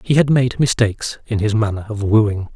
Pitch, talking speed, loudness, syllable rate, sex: 110 Hz, 210 wpm, -17 LUFS, 5.2 syllables/s, male